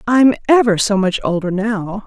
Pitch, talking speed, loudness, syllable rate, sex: 210 Hz, 175 wpm, -15 LUFS, 4.6 syllables/s, female